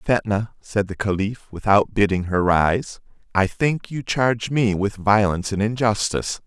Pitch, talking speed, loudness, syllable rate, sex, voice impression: 105 Hz, 160 wpm, -21 LUFS, 4.5 syllables/s, male, masculine, adult-like, tensed, powerful, bright, clear, slightly raspy, cool, intellectual, friendly, lively, slightly kind